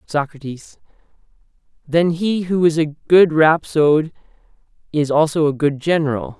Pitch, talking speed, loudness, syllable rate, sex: 155 Hz, 120 wpm, -17 LUFS, 4.5 syllables/s, male